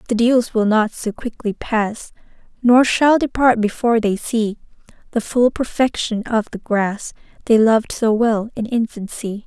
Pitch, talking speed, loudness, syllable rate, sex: 225 Hz, 160 wpm, -18 LUFS, 4.4 syllables/s, female